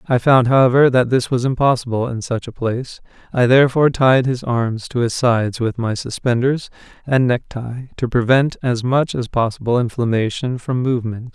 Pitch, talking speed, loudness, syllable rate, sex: 125 Hz, 175 wpm, -17 LUFS, 5.2 syllables/s, male